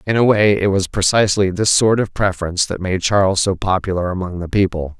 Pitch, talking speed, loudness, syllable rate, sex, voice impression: 95 Hz, 215 wpm, -17 LUFS, 6.0 syllables/s, male, very masculine, very adult-like, very thick, slightly relaxed, slightly weak, dark, hard, clear, fluent, cool, very intellectual, slightly refreshing, sincere, very calm, mature, very friendly, very reassuring, unique, slightly elegant, wild, very sweet, slightly lively, strict, slightly sharp, modest